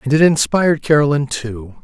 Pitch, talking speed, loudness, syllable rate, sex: 140 Hz, 165 wpm, -15 LUFS, 5.3 syllables/s, male